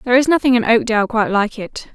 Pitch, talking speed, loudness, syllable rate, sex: 235 Hz, 245 wpm, -15 LUFS, 7.2 syllables/s, female